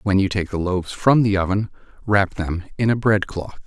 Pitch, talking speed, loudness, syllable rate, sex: 95 Hz, 230 wpm, -20 LUFS, 5.2 syllables/s, male